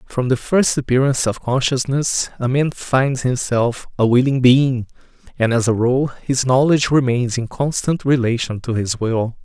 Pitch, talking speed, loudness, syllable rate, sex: 125 Hz, 165 wpm, -18 LUFS, 4.6 syllables/s, male